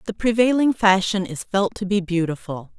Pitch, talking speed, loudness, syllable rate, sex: 195 Hz, 170 wpm, -20 LUFS, 5.0 syllables/s, female